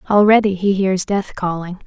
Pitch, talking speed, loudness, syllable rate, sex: 195 Hz, 160 wpm, -17 LUFS, 5.0 syllables/s, female